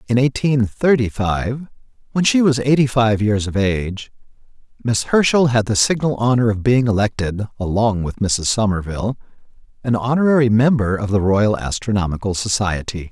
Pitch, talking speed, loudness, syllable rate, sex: 115 Hz, 150 wpm, -18 LUFS, 5.1 syllables/s, male